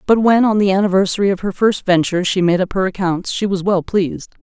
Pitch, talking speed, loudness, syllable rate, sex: 190 Hz, 245 wpm, -16 LUFS, 6.2 syllables/s, female